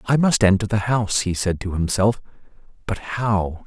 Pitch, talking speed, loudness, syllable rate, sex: 105 Hz, 180 wpm, -21 LUFS, 4.9 syllables/s, male